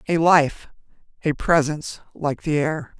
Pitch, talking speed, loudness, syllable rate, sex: 155 Hz, 140 wpm, -21 LUFS, 4.3 syllables/s, female